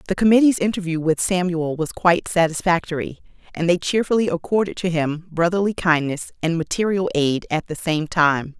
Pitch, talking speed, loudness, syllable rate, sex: 170 Hz, 160 wpm, -20 LUFS, 5.3 syllables/s, female